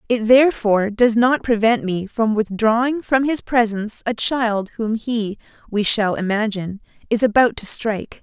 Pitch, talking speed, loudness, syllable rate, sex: 225 Hz, 160 wpm, -18 LUFS, 4.8 syllables/s, female